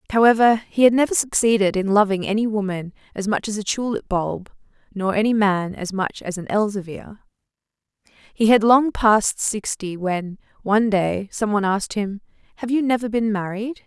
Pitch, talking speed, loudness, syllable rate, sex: 210 Hz, 175 wpm, -20 LUFS, 5.4 syllables/s, female